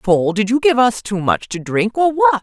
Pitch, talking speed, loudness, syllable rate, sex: 215 Hz, 275 wpm, -16 LUFS, 4.5 syllables/s, female